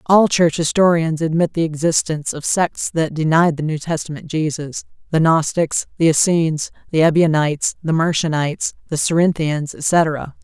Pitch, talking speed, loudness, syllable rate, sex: 160 Hz, 140 wpm, -18 LUFS, 4.9 syllables/s, female